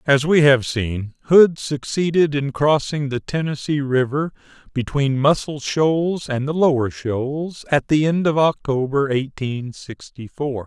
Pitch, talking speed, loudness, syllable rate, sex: 140 Hz, 145 wpm, -19 LUFS, 4.0 syllables/s, male